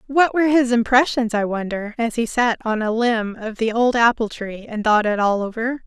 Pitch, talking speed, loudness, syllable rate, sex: 230 Hz, 225 wpm, -19 LUFS, 5.0 syllables/s, female